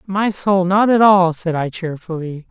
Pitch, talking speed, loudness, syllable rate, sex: 180 Hz, 190 wpm, -16 LUFS, 4.2 syllables/s, male